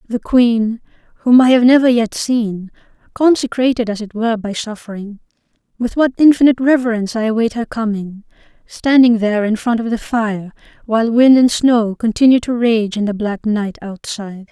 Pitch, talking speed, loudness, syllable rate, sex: 230 Hz, 170 wpm, -15 LUFS, 5.2 syllables/s, female